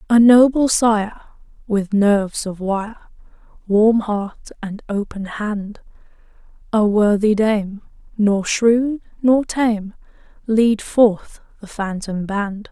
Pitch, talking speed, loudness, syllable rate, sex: 215 Hz, 115 wpm, -18 LUFS, 3.2 syllables/s, female